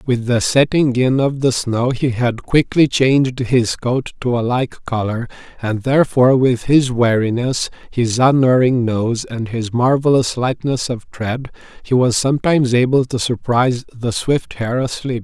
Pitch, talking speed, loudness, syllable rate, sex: 125 Hz, 160 wpm, -16 LUFS, 4.4 syllables/s, male